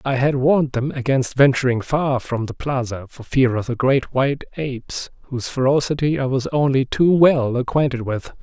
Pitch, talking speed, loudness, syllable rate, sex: 130 Hz, 185 wpm, -19 LUFS, 4.9 syllables/s, male